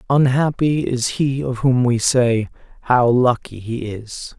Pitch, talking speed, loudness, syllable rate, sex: 125 Hz, 150 wpm, -18 LUFS, 3.7 syllables/s, male